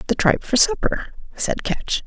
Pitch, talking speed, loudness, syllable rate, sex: 195 Hz, 175 wpm, -21 LUFS, 5.1 syllables/s, female